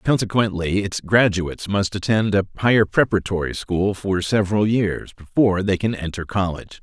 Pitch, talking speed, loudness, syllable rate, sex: 100 Hz, 150 wpm, -20 LUFS, 5.5 syllables/s, male